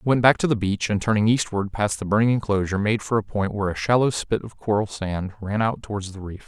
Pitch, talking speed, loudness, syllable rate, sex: 105 Hz, 270 wpm, -23 LUFS, 6.2 syllables/s, male